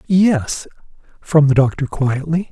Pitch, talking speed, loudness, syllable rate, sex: 150 Hz, 120 wpm, -16 LUFS, 3.8 syllables/s, male